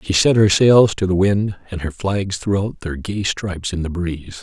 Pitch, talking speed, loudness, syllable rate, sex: 95 Hz, 245 wpm, -18 LUFS, 4.7 syllables/s, male